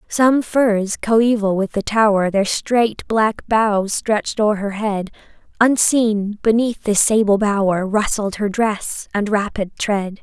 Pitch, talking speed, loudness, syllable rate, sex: 210 Hz, 145 wpm, -18 LUFS, 3.7 syllables/s, female